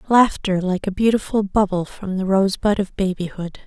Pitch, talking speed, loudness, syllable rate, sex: 195 Hz, 180 wpm, -20 LUFS, 5.2 syllables/s, female